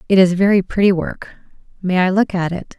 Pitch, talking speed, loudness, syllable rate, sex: 185 Hz, 195 wpm, -16 LUFS, 5.6 syllables/s, female